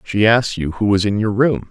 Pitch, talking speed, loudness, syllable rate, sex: 105 Hz, 280 wpm, -16 LUFS, 5.6 syllables/s, male